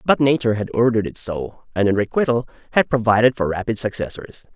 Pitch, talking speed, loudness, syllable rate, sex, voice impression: 115 Hz, 185 wpm, -20 LUFS, 6.3 syllables/s, male, very masculine, slightly adult-like, slightly thick, tensed, slightly powerful, bright, soft, clear, fluent, raspy, cool, slightly intellectual, very refreshing, sincere, calm, slightly mature, friendly, reassuring, unique, slightly elegant, wild, slightly sweet, lively, kind, slightly intense